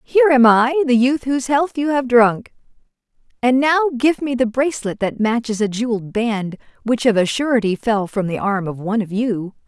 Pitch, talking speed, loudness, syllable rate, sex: 240 Hz, 205 wpm, -17 LUFS, 5.4 syllables/s, female